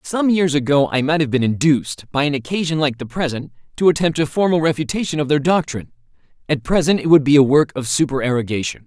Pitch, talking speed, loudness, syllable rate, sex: 145 Hz, 210 wpm, -18 LUFS, 6.4 syllables/s, male